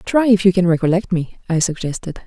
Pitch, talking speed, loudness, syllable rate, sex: 185 Hz, 210 wpm, -17 LUFS, 5.9 syllables/s, female